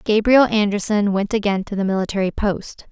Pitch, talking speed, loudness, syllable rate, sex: 205 Hz, 165 wpm, -19 LUFS, 5.3 syllables/s, female